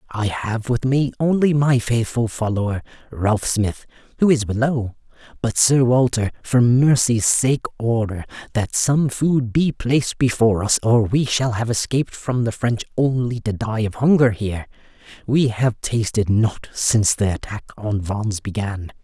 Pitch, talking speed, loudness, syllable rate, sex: 120 Hz, 160 wpm, -19 LUFS, 4.5 syllables/s, male